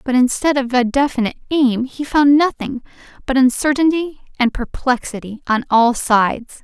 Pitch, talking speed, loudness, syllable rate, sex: 260 Hz, 145 wpm, -17 LUFS, 4.9 syllables/s, female